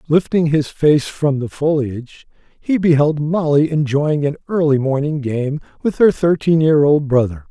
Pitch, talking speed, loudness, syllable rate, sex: 150 Hz, 160 wpm, -16 LUFS, 4.5 syllables/s, male